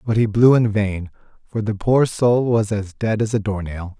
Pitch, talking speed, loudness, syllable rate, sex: 110 Hz, 240 wpm, -19 LUFS, 4.5 syllables/s, male